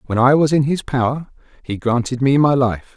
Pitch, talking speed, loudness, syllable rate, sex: 130 Hz, 225 wpm, -17 LUFS, 5.5 syllables/s, male